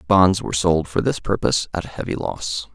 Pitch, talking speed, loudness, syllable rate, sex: 85 Hz, 220 wpm, -21 LUFS, 5.5 syllables/s, male